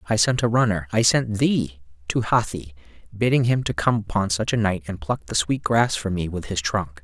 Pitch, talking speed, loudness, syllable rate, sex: 100 Hz, 215 wpm, -22 LUFS, 5.0 syllables/s, male